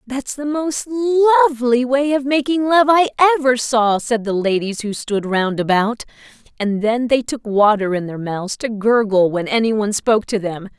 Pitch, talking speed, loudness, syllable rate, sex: 240 Hz, 190 wpm, -17 LUFS, 4.6 syllables/s, female